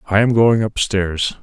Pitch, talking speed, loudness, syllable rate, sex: 105 Hz, 170 wpm, -16 LUFS, 4.2 syllables/s, male